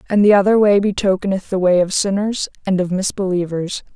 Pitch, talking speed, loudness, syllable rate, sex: 195 Hz, 180 wpm, -17 LUFS, 5.7 syllables/s, female